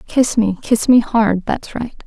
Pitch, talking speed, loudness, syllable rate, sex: 220 Hz, 205 wpm, -16 LUFS, 3.7 syllables/s, female